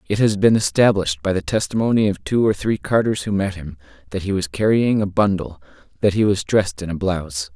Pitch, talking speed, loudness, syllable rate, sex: 100 Hz, 220 wpm, -19 LUFS, 5.9 syllables/s, male